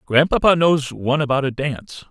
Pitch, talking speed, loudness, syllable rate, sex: 140 Hz, 170 wpm, -18 LUFS, 5.6 syllables/s, male